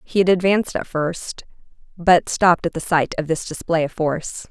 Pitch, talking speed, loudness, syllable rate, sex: 170 Hz, 200 wpm, -19 LUFS, 5.2 syllables/s, female